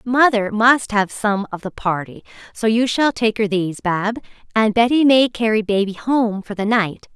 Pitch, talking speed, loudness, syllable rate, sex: 220 Hz, 195 wpm, -18 LUFS, 4.6 syllables/s, female